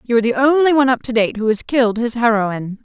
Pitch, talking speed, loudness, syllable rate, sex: 235 Hz, 275 wpm, -16 LUFS, 7.0 syllables/s, female